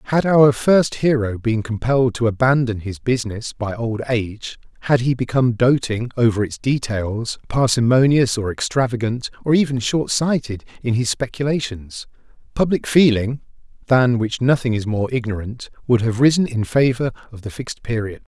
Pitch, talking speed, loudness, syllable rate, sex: 120 Hz, 145 wpm, -19 LUFS, 5.1 syllables/s, male